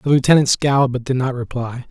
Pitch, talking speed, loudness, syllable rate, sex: 130 Hz, 220 wpm, -17 LUFS, 6.2 syllables/s, male